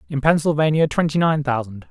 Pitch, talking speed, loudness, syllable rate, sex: 145 Hz, 155 wpm, -19 LUFS, 5.8 syllables/s, male